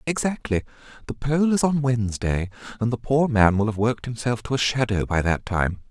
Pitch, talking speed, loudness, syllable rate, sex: 120 Hz, 205 wpm, -23 LUFS, 5.5 syllables/s, male